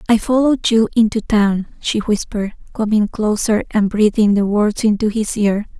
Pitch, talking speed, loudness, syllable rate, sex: 215 Hz, 165 wpm, -16 LUFS, 4.9 syllables/s, female